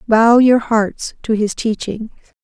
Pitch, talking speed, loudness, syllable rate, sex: 225 Hz, 150 wpm, -15 LUFS, 3.7 syllables/s, female